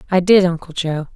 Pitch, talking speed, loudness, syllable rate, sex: 175 Hz, 210 wpm, -16 LUFS, 5.7 syllables/s, female